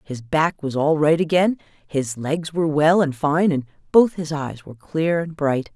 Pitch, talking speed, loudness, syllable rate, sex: 155 Hz, 210 wpm, -20 LUFS, 4.5 syllables/s, female